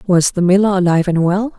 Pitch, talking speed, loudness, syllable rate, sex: 185 Hz, 225 wpm, -14 LUFS, 6.3 syllables/s, female